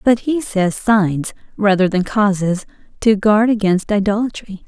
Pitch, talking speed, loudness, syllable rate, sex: 205 Hz, 140 wpm, -16 LUFS, 4.3 syllables/s, female